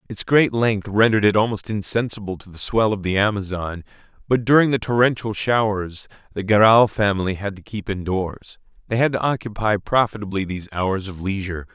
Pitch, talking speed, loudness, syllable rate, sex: 105 Hz, 175 wpm, -20 LUFS, 5.5 syllables/s, male